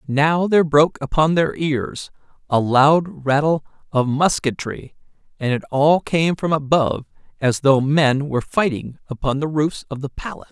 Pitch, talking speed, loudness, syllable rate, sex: 150 Hz, 160 wpm, -19 LUFS, 4.7 syllables/s, male